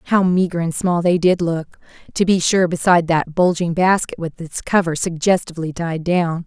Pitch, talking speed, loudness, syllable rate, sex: 170 Hz, 185 wpm, -18 LUFS, 5.0 syllables/s, female